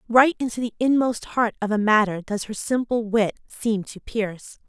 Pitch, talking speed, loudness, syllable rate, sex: 220 Hz, 190 wpm, -23 LUFS, 5.0 syllables/s, female